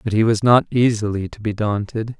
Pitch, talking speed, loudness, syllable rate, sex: 110 Hz, 220 wpm, -19 LUFS, 5.4 syllables/s, male